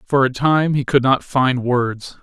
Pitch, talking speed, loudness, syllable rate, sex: 130 Hz, 215 wpm, -17 LUFS, 3.9 syllables/s, male